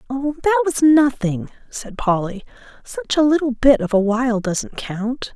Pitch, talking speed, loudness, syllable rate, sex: 255 Hz, 170 wpm, -18 LUFS, 4.4 syllables/s, female